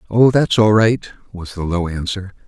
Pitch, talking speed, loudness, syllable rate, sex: 100 Hz, 195 wpm, -16 LUFS, 4.5 syllables/s, male